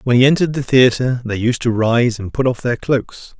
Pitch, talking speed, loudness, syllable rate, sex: 125 Hz, 245 wpm, -16 LUFS, 5.2 syllables/s, male